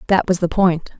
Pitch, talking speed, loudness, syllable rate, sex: 180 Hz, 240 wpm, -17 LUFS, 5.6 syllables/s, female